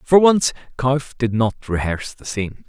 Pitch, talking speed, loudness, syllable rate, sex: 125 Hz, 180 wpm, -20 LUFS, 4.7 syllables/s, male